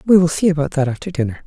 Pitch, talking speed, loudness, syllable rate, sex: 180 Hz, 285 wpm, -17 LUFS, 7.5 syllables/s, female